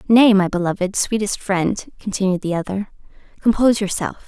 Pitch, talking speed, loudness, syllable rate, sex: 200 Hz, 140 wpm, -19 LUFS, 5.4 syllables/s, female